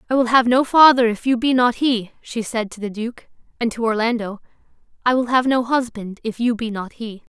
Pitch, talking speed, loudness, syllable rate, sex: 235 Hz, 230 wpm, -19 LUFS, 5.3 syllables/s, female